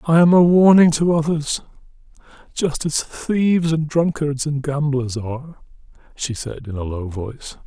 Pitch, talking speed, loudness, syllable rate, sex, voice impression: 150 Hz, 155 wpm, -18 LUFS, 4.5 syllables/s, male, very masculine, slightly old, very thick, tensed, very powerful, bright, soft, muffled, fluent, raspy, cool, intellectual, slightly refreshing, sincere, very calm, friendly, very reassuring, very unique, slightly elegant, wild, slightly sweet, lively, slightly strict, slightly intense